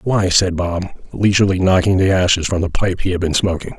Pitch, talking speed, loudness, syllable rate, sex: 90 Hz, 220 wpm, -16 LUFS, 5.9 syllables/s, male